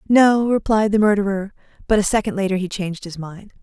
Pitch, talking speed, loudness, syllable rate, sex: 200 Hz, 200 wpm, -19 LUFS, 5.9 syllables/s, female